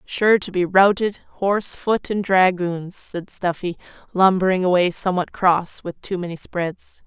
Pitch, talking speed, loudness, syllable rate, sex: 185 Hz, 155 wpm, -20 LUFS, 4.4 syllables/s, female